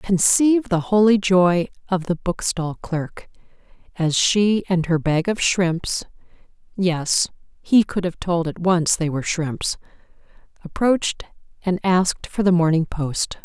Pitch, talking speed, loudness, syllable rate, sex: 180 Hz, 140 wpm, -20 LUFS, 4.1 syllables/s, female